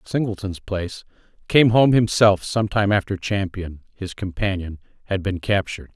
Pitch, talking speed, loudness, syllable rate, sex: 100 Hz, 130 wpm, -21 LUFS, 5.2 syllables/s, male